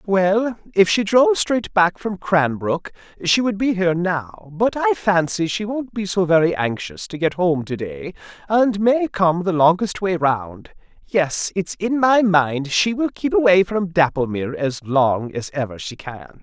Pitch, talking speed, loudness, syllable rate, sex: 180 Hz, 180 wpm, -19 LUFS, 4.2 syllables/s, male